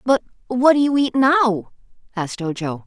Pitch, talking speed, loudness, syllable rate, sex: 230 Hz, 165 wpm, -19 LUFS, 4.8 syllables/s, female